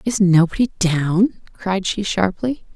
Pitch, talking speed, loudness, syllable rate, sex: 195 Hz, 130 wpm, -18 LUFS, 4.1 syllables/s, female